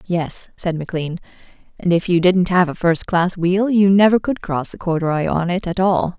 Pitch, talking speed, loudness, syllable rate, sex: 180 Hz, 205 wpm, -18 LUFS, 5.0 syllables/s, female